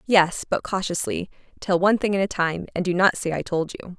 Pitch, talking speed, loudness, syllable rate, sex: 185 Hz, 240 wpm, -23 LUFS, 5.7 syllables/s, female